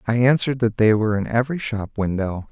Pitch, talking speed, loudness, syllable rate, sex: 115 Hz, 215 wpm, -20 LUFS, 6.3 syllables/s, male